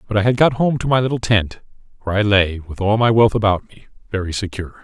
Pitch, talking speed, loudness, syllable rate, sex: 105 Hz, 250 wpm, -18 LUFS, 6.4 syllables/s, male